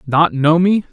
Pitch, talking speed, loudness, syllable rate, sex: 160 Hz, 195 wpm, -14 LUFS, 4.1 syllables/s, male